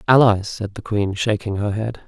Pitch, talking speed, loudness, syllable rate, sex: 105 Hz, 205 wpm, -20 LUFS, 4.9 syllables/s, male